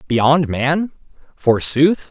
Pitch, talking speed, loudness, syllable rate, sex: 145 Hz, 85 wpm, -16 LUFS, 2.6 syllables/s, male